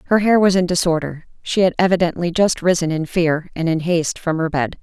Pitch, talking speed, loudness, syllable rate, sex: 170 Hz, 225 wpm, -18 LUFS, 5.8 syllables/s, female